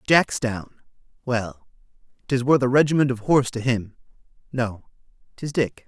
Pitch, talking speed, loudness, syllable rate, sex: 125 Hz, 110 wpm, -22 LUFS, 4.9 syllables/s, male